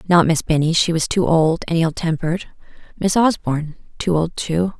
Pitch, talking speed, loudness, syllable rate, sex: 170 Hz, 190 wpm, -19 LUFS, 5.2 syllables/s, female